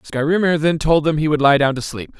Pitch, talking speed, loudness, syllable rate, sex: 150 Hz, 275 wpm, -17 LUFS, 5.4 syllables/s, male